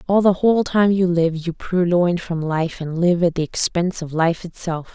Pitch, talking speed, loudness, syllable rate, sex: 175 Hz, 220 wpm, -19 LUFS, 4.8 syllables/s, female